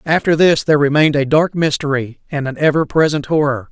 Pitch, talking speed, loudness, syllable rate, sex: 145 Hz, 195 wpm, -15 LUFS, 6.0 syllables/s, male